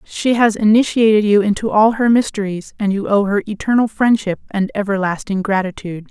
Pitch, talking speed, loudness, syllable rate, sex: 210 Hz, 165 wpm, -16 LUFS, 5.5 syllables/s, female